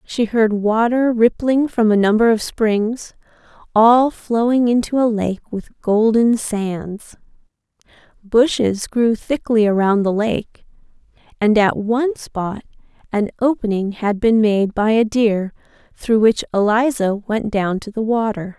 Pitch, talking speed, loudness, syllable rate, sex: 220 Hz, 140 wpm, -17 LUFS, 3.9 syllables/s, female